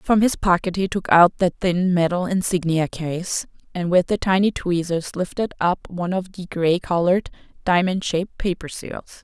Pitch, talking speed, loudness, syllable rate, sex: 180 Hz, 175 wpm, -21 LUFS, 4.8 syllables/s, female